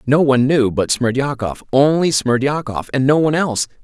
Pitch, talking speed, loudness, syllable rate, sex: 135 Hz, 170 wpm, -16 LUFS, 5.4 syllables/s, male